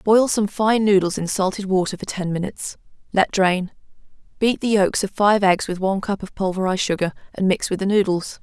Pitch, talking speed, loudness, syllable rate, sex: 195 Hz, 205 wpm, -20 LUFS, 5.6 syllables/s, female